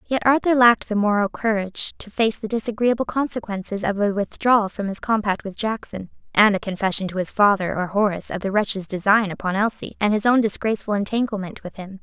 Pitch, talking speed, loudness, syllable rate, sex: 210 Hz, 200 wpm, -21 LUFS, 6.0 syllables/s, female